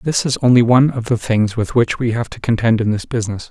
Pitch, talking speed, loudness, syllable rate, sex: 120 Hz, 275 wpm, -16 LUFS, 6.3 syllables/s, male